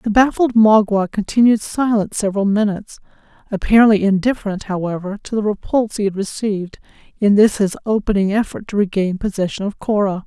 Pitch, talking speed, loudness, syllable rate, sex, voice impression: 205 Hz, 150 wpm, -17 LUFS, 5.9 syllables/s, female, very feminine, thin, slightly tensed, slightly weak, dark, soft, muffled, fluent, slightly raspy, slightly cute, intellectual, slightly refreshing, very sincere, very calm, very friendly, very reassuring, unique, very elegant, slightly wild, sweet, very kind, modest